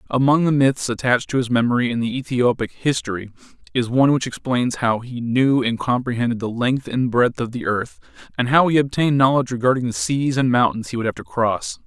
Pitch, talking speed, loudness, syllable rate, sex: 125 Hz, 210 wpm, -20 LUFS, 5.9 syllables/s, male